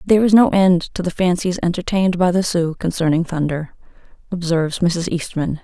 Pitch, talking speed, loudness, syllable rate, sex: 175 Hz, 170 wpm, -18 LUFS, 5.5 syllables/s, female